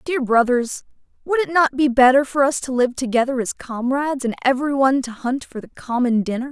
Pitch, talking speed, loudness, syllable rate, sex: 260 Hz, 205 wpm, -19 LUFS, 5.6 syllables/s, female